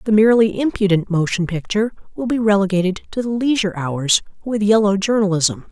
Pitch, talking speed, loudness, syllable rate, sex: 205 Hz, 155 wpm, -18 LUFS, 5.9 syllables/s, female